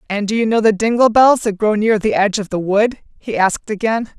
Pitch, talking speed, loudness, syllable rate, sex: 215 Hz, 260 wpm, -15 LUFS, 5.7 syllables/s, female